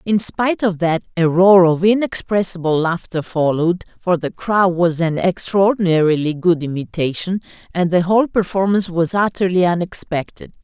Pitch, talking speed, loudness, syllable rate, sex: 180 Hz, 140 wpm, -17 LUFS, 5.1 syllables/s, female